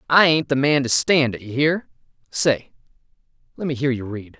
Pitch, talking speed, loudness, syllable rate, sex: 135 Hz, 190 wpm, -20 LUFS, 5.1 syllables/s, male